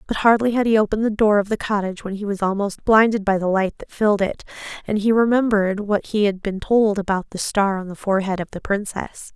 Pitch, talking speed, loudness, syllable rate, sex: 205 Hz, 245 wpm, -20 LUFS, 6.1 syllables/s, female